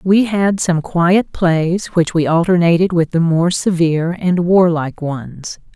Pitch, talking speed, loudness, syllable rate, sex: 170 Hz, 155 wpm, -15 LUFS, 3.9 syllables/s, female